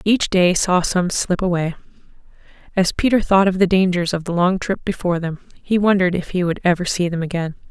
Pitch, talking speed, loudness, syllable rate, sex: 180 Hz, 210 wpm, -18 LUFS, 5.8 syllables/s, female